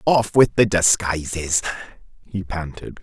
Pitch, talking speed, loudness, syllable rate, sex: 95 Hz, 120 wpm, -19 LUFS, 4.0 syllables/s, male